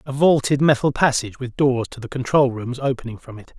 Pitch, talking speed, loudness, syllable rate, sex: 130 Hz, 215 wpm, -20 LUFS, 5.9 syllables/s, male